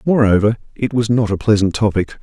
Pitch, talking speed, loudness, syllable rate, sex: 110 Hz, 190 wpm, -16 LUFS, 5.7 syllables/s, male